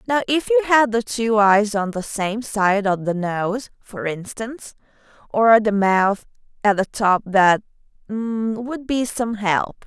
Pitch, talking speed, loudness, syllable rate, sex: 215 Hz, 150 wpm, -19 LUFS, 3.7 syllables/s, female